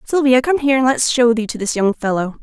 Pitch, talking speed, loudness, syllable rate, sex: 245 Hz, 270 wpm, -16 LUFS, 6.1 syllables/s, female